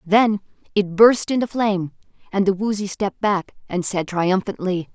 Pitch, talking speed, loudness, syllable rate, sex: 200 Hz, 160 wpm, -20 LUFS, 4.8 syllables/s, female